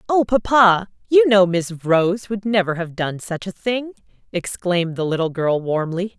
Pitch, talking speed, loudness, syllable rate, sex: 190 Hz, 175 wpm, -19 LUFS, 4.5 syllables/s, female